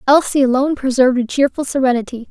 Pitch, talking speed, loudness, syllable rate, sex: 260 Hz, 155 wpm, -15 LUFS, 6.9 syllables/s, female